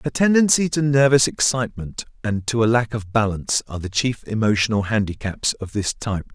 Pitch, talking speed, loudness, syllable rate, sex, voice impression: 115 Hz, 180 wpm, -20 LUFS, 5.7 syllables/s, male, masculine, very adult-like, slightly muffled, fluent, sincere, calm, elegant, slightly sweet